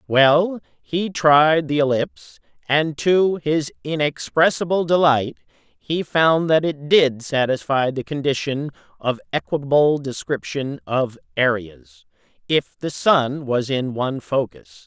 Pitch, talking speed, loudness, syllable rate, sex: 145 Hz, 120 wpm, -20 LUFS, 3.7 syllables/s, male